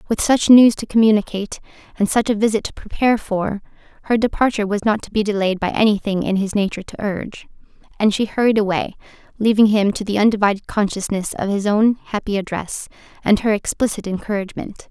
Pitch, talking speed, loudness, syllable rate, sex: 210 Hz, 180 wpm, -18 LUFS, 6.2 syllables/s, female